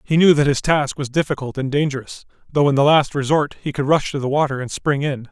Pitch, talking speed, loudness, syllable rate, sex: 140 Hz, 260 wpm, -19 LUFS, 6.0 syllables/s, male